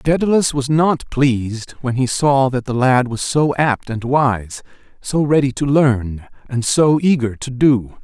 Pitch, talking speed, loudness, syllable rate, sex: 135 Hz, 180 wpm, -17 LUFS, 4.1 syllables/s, male